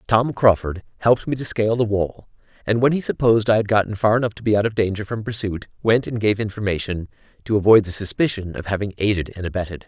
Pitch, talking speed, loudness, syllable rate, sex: 105 Hz, 225 wpm, -20 LUFS, 6.3 syllables/s, male